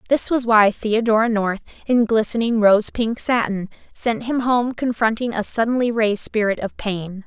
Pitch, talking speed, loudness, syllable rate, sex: 225 Hz, 165 wpm, -19 LUFS, 4.7 syllables/s, female